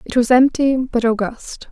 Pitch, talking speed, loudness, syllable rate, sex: 245 Hz, 175 wpm, -16 LUFS, 4.4 syllables/s, female